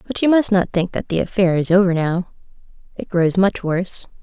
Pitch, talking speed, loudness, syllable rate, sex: 185 Hz, 215 wpm, -18 LUFS, 5.4 syllables/s, female